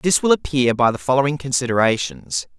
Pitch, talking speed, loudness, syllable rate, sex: 125 Hz, 165 wpm, -19 LUFS, 5.7 syllables/s, male